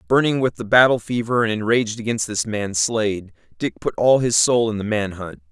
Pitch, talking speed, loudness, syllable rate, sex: 110 Hz, 215 wpm, -19 LUFS, 5.5 syllables/s, male